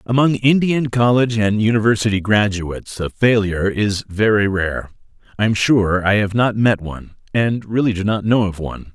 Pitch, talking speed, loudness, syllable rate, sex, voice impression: 105 Hz, 175 wpm, -17 LUFS, 5.2 syllables/s, male, very masculine, slightly old, very thick, slightly tensed, very powerful, bright, soft, very muffled, fluent, slightly raspy, very cool, intellectual, slightly refreshing, sincere, very calm, very mature, friendly, reassuring, very unique, elegant, wild, sweet, lively, very kind, modest